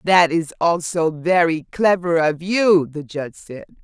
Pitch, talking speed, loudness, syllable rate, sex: 170 Hz, 155 wpm, -18 LUFS, 4.1 syllables/s, female